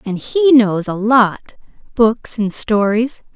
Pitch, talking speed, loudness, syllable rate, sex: 225 Hz, 125 wpm, -15 LUFS, 3.7 syllables/s, female